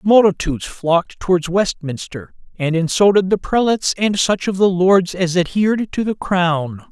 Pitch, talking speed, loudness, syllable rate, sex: 185 Hz, 155 wpm, -17 LUFS, 4.8 syllables/s, male